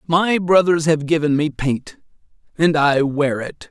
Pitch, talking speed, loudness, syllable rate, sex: 155 Hz, 160 wpm, -18 LUFS, 4.0 syllables/s, male